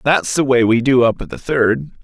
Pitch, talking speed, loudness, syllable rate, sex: 125 Hz, 265 wpm, -15 LUFS, 5.0 syllables/s, male